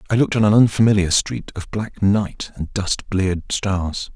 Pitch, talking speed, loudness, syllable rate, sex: 100 Hz, 190 wpm, -19 LUFS, 4.8 syllables/s, male